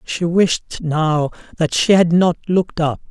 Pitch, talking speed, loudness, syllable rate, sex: 170 Hz, 175 wpm, -17 LUFS, 4.2 syllables/s, male